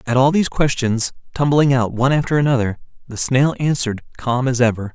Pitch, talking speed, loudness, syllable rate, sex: 130 Hz, 180 wpm, -18 LUFS, 5.9 syllables/s, male